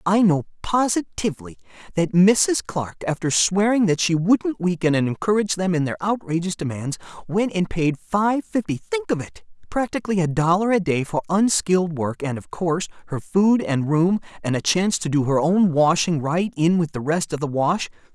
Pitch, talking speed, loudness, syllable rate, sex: 175 Hz, 190 wpm, -21 LUFS, 5.0 syllables/s, male